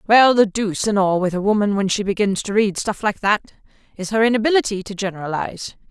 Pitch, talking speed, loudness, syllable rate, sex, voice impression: 205 Hz, 215 wpm, -19 LUFS, 6.3 syllables/s, female, very feminine, slightly young, very adult-like, thin, tensed, slightly weak, slightly dark, very hard, very clear, very fluent, cute, slightly cool, very intellectual, refreshing, sincere, very calm, friendly, reassuring, unique, very elegant, slightly wild, sweet, slightly lively, strict, slightly intense